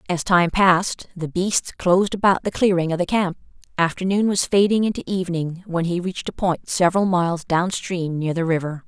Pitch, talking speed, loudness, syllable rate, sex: 180 Hz, 190 wpm, -21 LUFS, 5.5 syllables/s, female